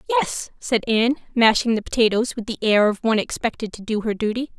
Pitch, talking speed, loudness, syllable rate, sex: 230 Hz, 210 wpm, -21 LUFS, 6.1 syllables/s, female